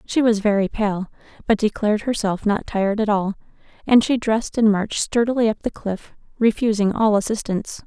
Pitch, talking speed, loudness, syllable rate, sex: 215 Hz, 175 wpm, -20 LUFS, 5.6 syllables/s, female